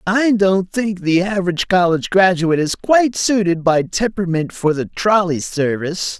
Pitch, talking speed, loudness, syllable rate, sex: 185 Hz, 155 wpm, -16 LUFS, 5.1 syllables/s, male